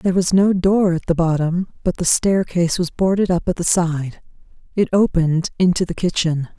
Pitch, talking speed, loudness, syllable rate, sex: 175 Hz, 190 wpm, -18 LUFS, 5.3 syllables/s, female